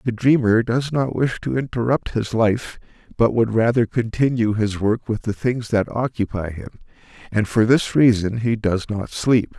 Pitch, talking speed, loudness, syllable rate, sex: 115 Hz, 180 wpm, -20 LUFS, 4.6 syllables/s, male